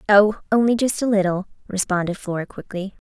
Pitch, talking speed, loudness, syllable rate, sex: 200 Hz, 155 wpm, -21 LUFS, 5.6 syllables/s, female